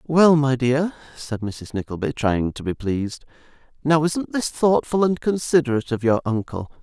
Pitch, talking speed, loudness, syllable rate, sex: 135 Hz, 165 wpm, -21 LUFS, 4.9 syllables/s, male